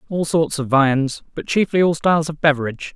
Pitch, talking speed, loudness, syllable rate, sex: 150 Hz, 205 wpm, -18 LUFS, 5.7 syllables/s, male